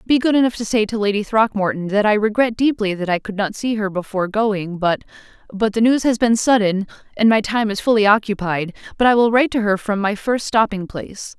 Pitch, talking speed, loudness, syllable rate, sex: 215 Hz, 225 wpm, -18 LUFS, 5.8 syllables/s, female